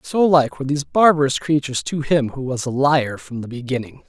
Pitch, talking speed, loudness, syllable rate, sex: 140 Hz, 220 wpm, -19 LUFS, 5.8 syllables/s, male